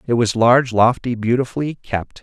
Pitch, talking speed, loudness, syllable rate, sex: 120 Hz, 160 wpm, -17 LUFS, 5.3 syllables/s, male